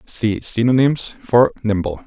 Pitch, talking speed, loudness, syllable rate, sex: 115 Hz, 115 wpm, -17 LUFS, 3.9 syllables/s, male